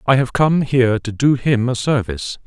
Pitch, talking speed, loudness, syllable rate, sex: 125 Hz, 220 wpm, -17 LUFS, 5.2 syllables/s, male